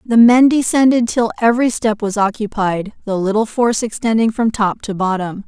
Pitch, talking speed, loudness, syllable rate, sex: 220 Hz, 175 wpm, -15 LUFS, 5.3 syllables/s, female